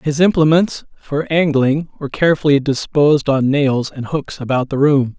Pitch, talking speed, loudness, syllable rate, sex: 145 Hz, 160 wpm, -16 LUFS, 5.0 syllables/s, male